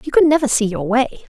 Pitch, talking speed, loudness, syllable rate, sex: 250 Hz, 265 wpm, -17 LUFS, 6.4 syllables/s, female